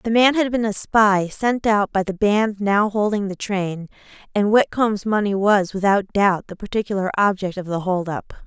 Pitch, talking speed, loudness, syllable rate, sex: 205 Hz, 200 wpm, -20 LUFS, 4.6 syllables/s, female